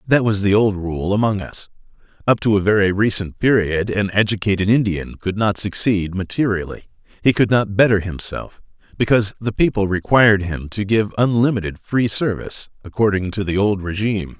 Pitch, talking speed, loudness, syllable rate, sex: 100 Hz, 165 wpm, -18 LUFS, 5.4 syllables/s, male